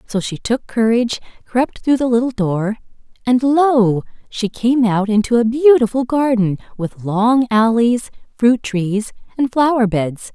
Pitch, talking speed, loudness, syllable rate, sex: 230 Hz, 150 wpm, -16 LUFS, 4.1 syllables/s, female